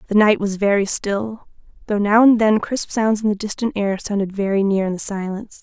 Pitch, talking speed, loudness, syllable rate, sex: 205 Hz, 225 wpm, -19 LUFS, 5.4 syllables/s, female